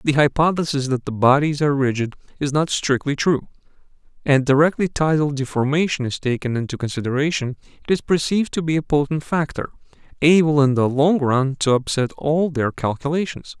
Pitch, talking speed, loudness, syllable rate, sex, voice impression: 145 Hz, 165 wpm, -20 LUFS, 5.6 syllables/s, male, masculine, adult-like, tensed, bright, clear, cool, slightly refreshing, friendly, wild, slightly intense